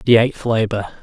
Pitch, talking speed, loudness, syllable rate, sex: 115 Hz, 175 wpm, -17 LUFS, 5.3 syllables/s, male